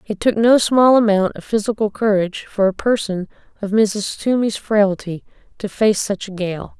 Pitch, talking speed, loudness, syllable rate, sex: 205 Hz, 175 wpm, -17 LUFS, 4.7 syllables/s, female